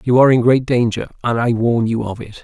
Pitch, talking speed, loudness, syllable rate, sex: 120 Hz, 270 wpm, -16 LUFS, 5.8 syllables/s, male